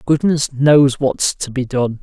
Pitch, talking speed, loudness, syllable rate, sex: 135 Hz, 180 wpm, -15 LUFS, 3.7 syllables/s, male